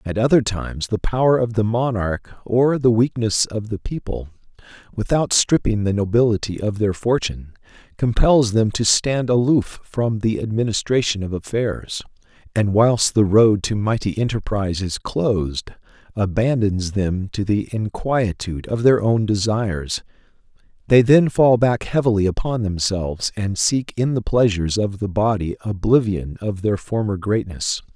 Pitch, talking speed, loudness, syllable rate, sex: 110 Hz, 150 wpm, -19 LUFS, 4.6 syllables/s, male